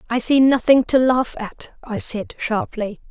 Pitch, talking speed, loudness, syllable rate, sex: 240 Hz, 175 wpm, -18 LUFS, 4.1 syllables/s, female